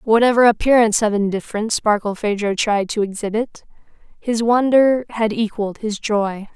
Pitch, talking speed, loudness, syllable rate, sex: 220 Hz, 130 wpm, -18 LUFS, 5.3 syllables/s, female